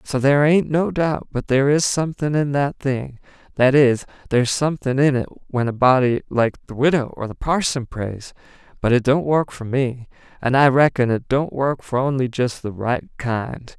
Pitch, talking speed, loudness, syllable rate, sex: 130 Hz, 200 wpm, -20 LUFS, 4.9 syllables/s, male